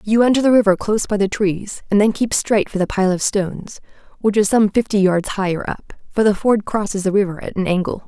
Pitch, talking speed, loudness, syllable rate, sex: 205 Hz, 245 wpm, -18 LUFS, 5.7 syllables/s, female